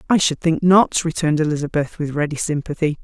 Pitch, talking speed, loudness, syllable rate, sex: 160 Hz, 180 wpm, -19 LUFS, 6.0 syllables/s, female